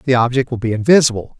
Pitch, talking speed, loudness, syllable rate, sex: 125 Hz, 215 wpm, -15 LUFS, 6.7 syllables/s, male